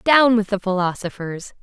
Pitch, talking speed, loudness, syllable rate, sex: 205 Hz, 150 wpm, -20 LUFS, 4.7 syllables/s, female